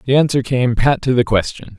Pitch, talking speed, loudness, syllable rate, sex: 125 Hz, 235 wpm, -16 LUFS, 5.5 syllables/s, male